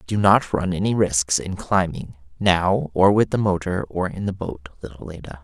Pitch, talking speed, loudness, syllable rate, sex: 90 Hz, 200 wpm, -21 LUFS, 4.7 syllables/s, male